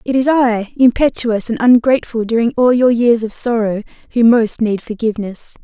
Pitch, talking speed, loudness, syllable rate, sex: 230 Hz, 150 wpm, -14 LUFS, 5.1 syllables/s, female